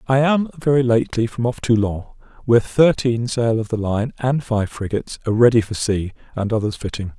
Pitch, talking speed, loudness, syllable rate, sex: 115 Hz, 190 wpm, -19 LUFS, 5.7 syllables/s, male